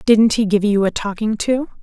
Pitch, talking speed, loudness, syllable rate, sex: 215 Hz, 230 wpm, -17 LUFS, 5.0 syllables/s, female